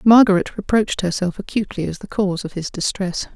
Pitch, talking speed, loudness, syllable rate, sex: 195 Hz, 180 wpm, -20 LUFS, 6.2 syllables/s, female